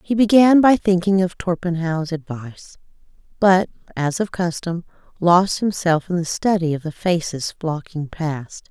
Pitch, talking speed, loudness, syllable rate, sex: 175 Hz, 145 wpm, -19 LUFS, 4.4 syllables/s, female